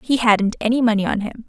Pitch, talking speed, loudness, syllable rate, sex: 225 Hz, 245 wpm, -18 LUFS, 6.0 syllables/s, female